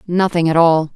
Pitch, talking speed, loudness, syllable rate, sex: 170 Hz, 190 wpm, -14 LUFS, 5.0 syllables/s, female